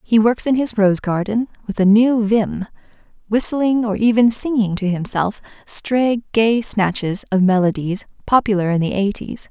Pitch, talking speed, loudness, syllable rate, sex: 215 Hz, 160 wpm, -17 LUFS, 4.5 syllables/s, female